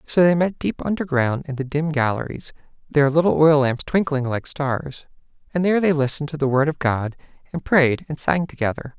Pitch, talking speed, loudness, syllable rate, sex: 145 Hz, 200 wpm, -20 LUFS, 5.4 syllables/s, male